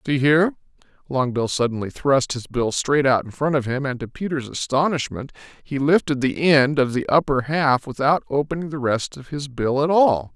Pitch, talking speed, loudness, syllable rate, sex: 140 Hz, 195 wpm, -21 LUFS, 5.1 syllables/s, male